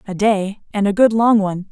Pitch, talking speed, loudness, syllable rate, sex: 205 Hz, 245 wpm, -16 LUFS, 5.6 syllables/s, female